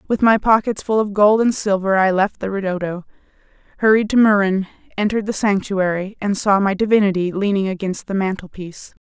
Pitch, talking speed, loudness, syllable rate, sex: 200 Hz, 175 wpm, -18 LUFS, 5.7 syllables/s, female